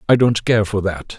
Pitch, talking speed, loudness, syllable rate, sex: 105 Hz, 255 wpm, -17 LUFS, 5.0 syllables/s, male